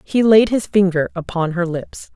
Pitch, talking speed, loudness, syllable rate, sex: 185 Hz, 195 wpm, -17 LUFS, 4.5 syllables/s, female